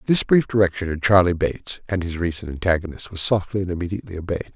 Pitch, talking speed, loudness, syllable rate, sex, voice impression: 90 Hz, 200 wpm, -21 LUFS, 6.7 syllables/s, male, very masculine, very adult-like, very middle-aged, very thick, slightly tensed, slightly powerful, slightly dark, hard, muffled, fluent, raspy, very cool, intellectual, very sincere, very calm, very mature, friendly, reassuring, wild, slightly sweet, slightly lively, kind, slightly modest